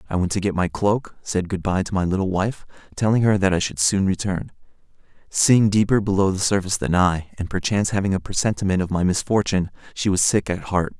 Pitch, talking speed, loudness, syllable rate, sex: 95 Hz, 220 wpm, -21 LUFS, 6.0 syllables/s, male